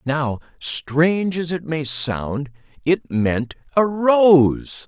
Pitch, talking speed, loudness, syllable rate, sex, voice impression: 150 Hz, 100 wpm, -19 LUFS, 2.7 syllables/s, male, very masculine, very adult-like, very middle-aged, very thick, tensed, slightly powerful, bright, hard, slightly clear, fluent, very cool, very intellectual, slightly refreshing, sincere, very calm, very mature, very friendly, very reassuring, very unique, elegant, slightly wild, sweet, lively, kind, slightly intense